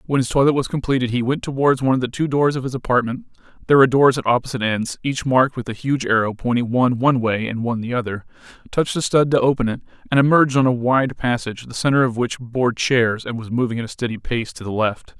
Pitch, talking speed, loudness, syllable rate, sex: 125 Hz, 245 wpm, -19 LUFS, 6.6 syllables/s, male